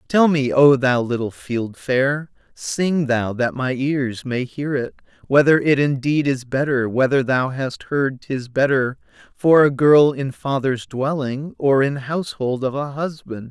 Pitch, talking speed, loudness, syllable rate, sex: 135 Hz, 165 wpm, -19 LUFS, 4.0 syllables/s, male